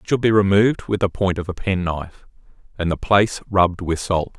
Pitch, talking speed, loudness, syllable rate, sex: 95 Hz, 220 wpm, -20 LUFS, 5.8 syllables/s, male